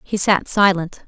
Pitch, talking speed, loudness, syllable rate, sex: 185 Hz, 165 wpm, -17 LUFS, 4.1 syllables/s, female